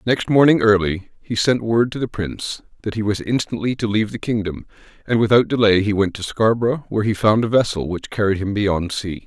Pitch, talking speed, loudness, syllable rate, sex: 105 Hz, 220 wpm, -19 LUFS, 5.7 syllables/s, male